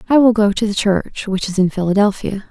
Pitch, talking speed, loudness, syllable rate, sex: 205 Hz, 240 wpm, -16 LUFS, 5.7 syllables/s, female